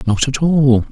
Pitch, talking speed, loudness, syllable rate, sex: 135 Hz, 195 wpm, -14 LUFS, 4.0 syllables/s, male